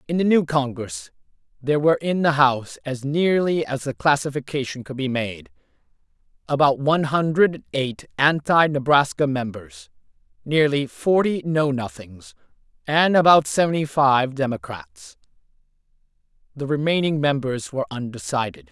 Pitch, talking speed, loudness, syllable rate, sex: 145 Hz, 120 wpm, -21 LUFS, 4.8 syllables/s, male